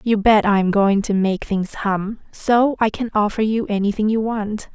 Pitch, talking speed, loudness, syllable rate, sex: 210 Hz, 215 wpm, -19 LUFS, 4.5 syllables/s, female